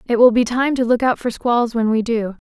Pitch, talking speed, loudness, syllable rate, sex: 235 Hz, 290 wpm, -17 LUFS, 5.4 syllables/s, female